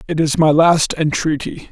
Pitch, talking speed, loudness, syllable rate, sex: 155 Hz, 175 wpm, -15 LUFS, 4.5 syllables/s, male